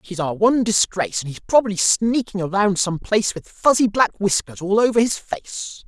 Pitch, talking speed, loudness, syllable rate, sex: 200 Hz, 195 wpm, -19 LUFS, 5.2 syllables/s, male